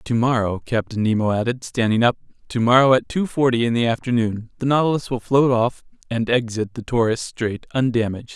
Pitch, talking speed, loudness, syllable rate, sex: 120 Hz, 170 wpm, -20 LUFS, 5.6 syllables/s, male